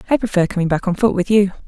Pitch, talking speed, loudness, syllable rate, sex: 190 Hz, 285 wpm, -17 LUFS, 7.4 syllables/s, female